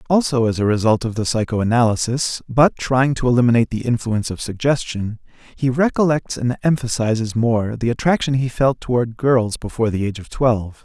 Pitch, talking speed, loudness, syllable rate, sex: 120 Hz, 170 wpm, -19 LUFS, 5.6 syllables/s, male